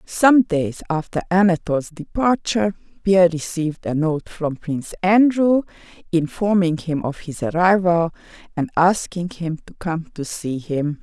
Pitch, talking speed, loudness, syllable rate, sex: 175 Hz, 135 wpm, -20 LUFS, 4.5 syllables/s, female